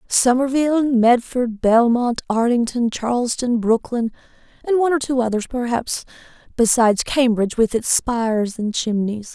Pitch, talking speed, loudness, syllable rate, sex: 240 Hz, 120 wpm, -19 LUFS, 4.8 syllables/s, female